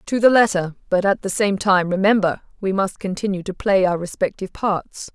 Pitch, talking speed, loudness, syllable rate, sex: 195 Hz, 200 wpm, -20 LUFS, 5.3 syllables/s, female